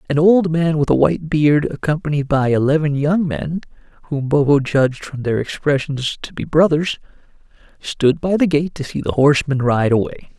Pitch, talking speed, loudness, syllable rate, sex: 150 Hz, 175 wpm, -17 LUFS, 5.1 syllables/s, male